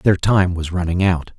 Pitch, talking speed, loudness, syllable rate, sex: 90 Hz, 215 wpm, -18 LUFS, 4.5 syllables/s, male